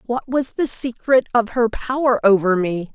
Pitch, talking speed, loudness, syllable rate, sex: 235 Hz, 185 wpm, -19 LUFS, 4.5 syllables/s, female